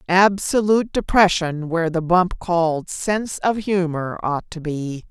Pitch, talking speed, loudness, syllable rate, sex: 175 Hz, 140 wpm, -20 LUFS, 4.3 syllables/s, female